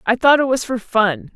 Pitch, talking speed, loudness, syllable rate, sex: 240 Hz, 265 wpm, -17 LUFS, 4.9 syllables/s, female